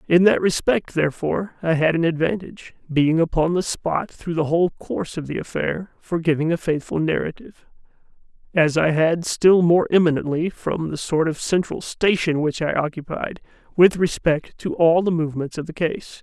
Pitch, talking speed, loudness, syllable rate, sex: 165 Hz, 175 wpm, -21 LUFS, 5.1 syllables/s, male